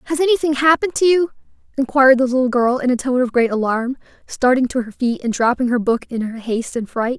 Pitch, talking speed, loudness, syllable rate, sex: 255 Hz, 235 wpm, -17 LUFS, 6.3 syllables/s, female